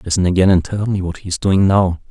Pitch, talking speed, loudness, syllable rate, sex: 95 Hz, 255 wpm, -16 LUFS, 5.6 syllables/s, male